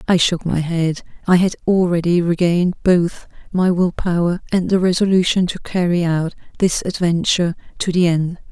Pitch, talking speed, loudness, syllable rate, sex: 175 Hz, 160 wpm, -18 LUFS, 5.0 syllables/s, female